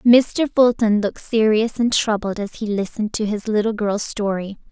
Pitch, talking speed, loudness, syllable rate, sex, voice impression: 215 Hz, 180 wpm, -19 LUFS, 4.9 syllables/s, female, feminine, slightly young, bright, very cute, refreshing, friendly, slightly lively